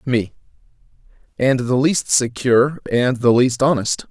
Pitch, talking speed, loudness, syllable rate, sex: 125 Hz, 130 wpm, -17 LUFS, 4.2 syllables/s, male